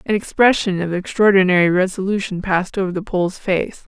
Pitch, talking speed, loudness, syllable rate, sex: 190 Hz, 150 wpm, -17 LUFS, 5.8 syllables/s, female